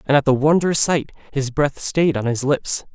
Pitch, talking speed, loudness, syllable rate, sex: 145 Hz, 225 wpm, -19 LUFS, 4.7 syllables/s, male